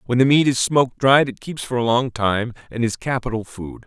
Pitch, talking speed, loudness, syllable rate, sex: 120 Hz, 250 wpm, -19 LUFS, 5.4 syllables/s, male